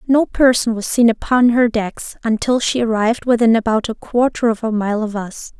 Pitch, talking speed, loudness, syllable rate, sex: 230 Hz, 205 wpm, -16 LUFS, 5.1 syllables/s, female